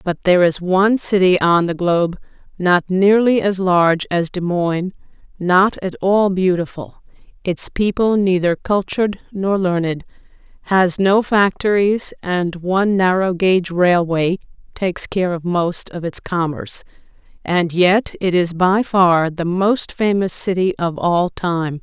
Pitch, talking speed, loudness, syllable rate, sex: 185 Hz, 145 wpm, -17 LUFS, 4.2 syllables/s, female